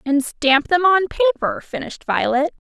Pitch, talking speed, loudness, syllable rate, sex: 320 Hz, 155 wpm, -18 LUFS, 5.3 syllables/s, female